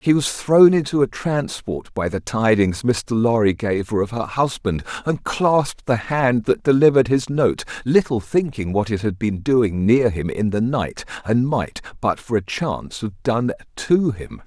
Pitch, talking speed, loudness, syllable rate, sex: 120 Hz, 185 wpm, -20 LUFS, 4.4 syllables/s, male